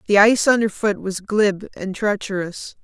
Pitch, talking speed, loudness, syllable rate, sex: 205 Hz, 150 wpm, -19 LUFS, 4.6 syllables/s, female